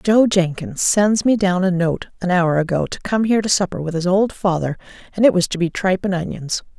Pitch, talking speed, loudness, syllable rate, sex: 185 Hz, 240 wpm, -18 LUFS, 5.5 syllables/s, female